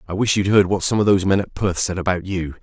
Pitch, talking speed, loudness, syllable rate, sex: 95 Hz, 320 wpm, -19 LUFS, 6.6 syllables/s, male